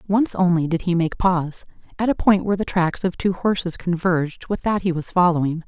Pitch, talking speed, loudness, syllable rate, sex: 180 Hz, 220 wpm, -21 LUFS, 5.6 syllables/s, female